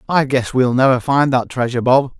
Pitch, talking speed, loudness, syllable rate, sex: 130 Hz, 220 wpm, -16 LUFS, 5.6 syllables/s, male